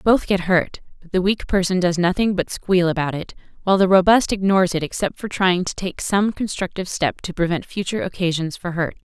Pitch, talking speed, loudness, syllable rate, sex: 180 Hz, 210 wpm, -20 LUFS, 5.7 syllables/s, female